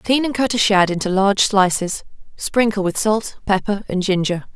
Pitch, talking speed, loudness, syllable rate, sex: 200 Hz, 185 wpm, -18 LUFS, 5.0 syllables/s, female